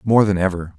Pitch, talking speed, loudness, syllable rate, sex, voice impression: 95 Hz, 230 wpm, -18 LUFS, 6.1 syllables/s, male, masculine, middle-aged, tensed, slightly soft, clear, intellectual, calm, mature, friendly, reassuring, wild, lively, slightly kind